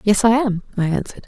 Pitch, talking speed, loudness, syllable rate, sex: 210 Hz, 235 wpm, -19 LUFS, 6.7 syllables/s, female